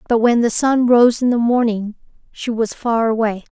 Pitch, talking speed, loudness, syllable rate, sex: 230 Hz, 205 wpm, -16 LUFS, 4.8 syllables/s, female